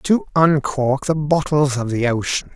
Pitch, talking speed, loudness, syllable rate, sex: 140 Hz, 165 wpm, -18 LUFS, 4.1 syllables/s, male